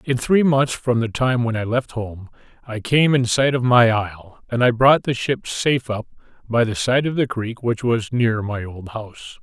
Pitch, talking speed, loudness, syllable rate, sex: 120 Hz, 230 wpm, -19 LUFS, 4.6 syllables/s, male